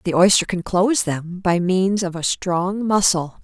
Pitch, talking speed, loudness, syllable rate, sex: 185 Hz, 190 wpm, -19 LUFS, 4.3 syllables/s, female